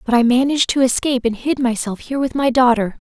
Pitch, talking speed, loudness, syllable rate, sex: 250 Hz, 235 wpm, -17 LUFS, 6.6 syllables/s, female